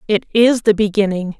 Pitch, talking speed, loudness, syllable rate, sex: 210 Hz, 170 wpm, -15 LUFS, 5.2 syllables/s, female